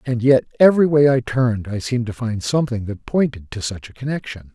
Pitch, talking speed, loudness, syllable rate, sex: 120 Hz, 225 wpm, -19 LUFS, 6.1 syllables/s, male